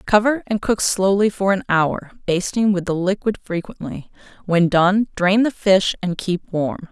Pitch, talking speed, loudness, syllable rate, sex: 190 Hz, 175 wpm, -19 LUFS, 4.3 syllables/s, female